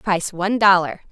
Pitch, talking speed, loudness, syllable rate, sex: 190 Hz, 160 wpm, -17 LUFS, 5.9 syllables/s, female